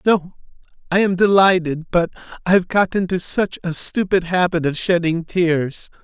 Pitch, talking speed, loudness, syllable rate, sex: 175 Hz, 150 wpm, -18 LUFS, 4.5 syllables/s, male